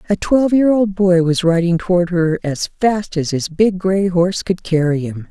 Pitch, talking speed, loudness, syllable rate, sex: 180 Hz, 215 wpm, -16 LUFS, 4.7 syllables/s, female